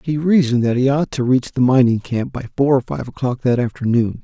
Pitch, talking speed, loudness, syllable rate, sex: 130 Hz, 240 wpm, -17 LUFS, 5.7 syllables/s, male